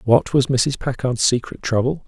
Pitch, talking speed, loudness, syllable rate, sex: 125 Hz, 175 wpm, -19 LUFS, 4.6 syllables/s, male